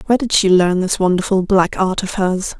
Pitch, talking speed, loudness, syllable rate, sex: 190 Hz, 230 wpm, -16 LUFS, 5.4 syllables/s, female